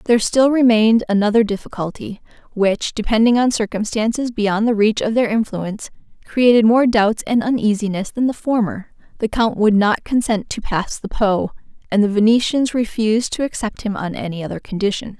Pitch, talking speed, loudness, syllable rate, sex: 220 Hz, 170 wpm, -18 LUFS, 5.3 syllables/s, female